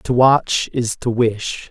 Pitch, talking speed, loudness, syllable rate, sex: 120 Hz, 175 wpm, -17 LUFS, 3.1 syllables/s, male